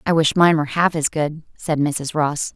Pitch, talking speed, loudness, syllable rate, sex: 155 Hz, 235 wpm, -19 LUFS, 4.9 syllables/s, female